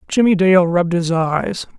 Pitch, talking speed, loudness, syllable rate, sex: 180 Hz, 170 wpm, -16 LUFS, 4.6 syllables/s, male